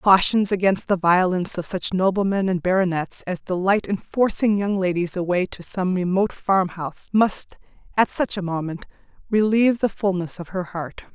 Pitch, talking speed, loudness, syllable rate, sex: 190 Hz, 170 wpm, -21 LUFS, 5.0 syllables/s, female